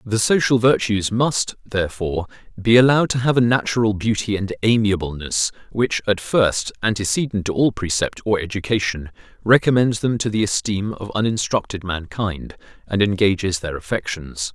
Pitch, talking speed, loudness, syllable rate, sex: 105 Hz, 145 wpm, -20 LUFS, 5.1 syllables/s, male